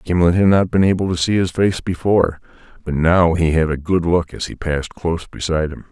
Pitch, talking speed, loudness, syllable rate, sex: 85 Hz, 235 wpm, -18 LUFS, 5.8 syllables/s, male